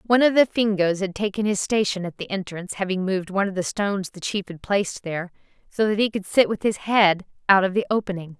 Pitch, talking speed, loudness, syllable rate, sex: 195 Hz, 245 wpm, -22 LUFS, 6.3 syllables/s, female